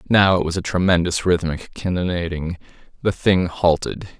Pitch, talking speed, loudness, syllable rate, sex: 90 Hz, 145 wpm, -20 LUFS, 5.0 syllables/s, male